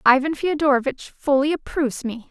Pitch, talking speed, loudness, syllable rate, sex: 280 Hz, 130 wpm, -21 LUFS, 5.5 syllables/s, female